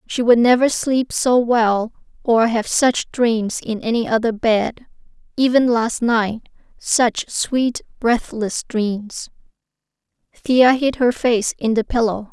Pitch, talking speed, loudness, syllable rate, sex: 235 Hz, 130 wpm, -18 LUFS, 3.5 syllables/s, female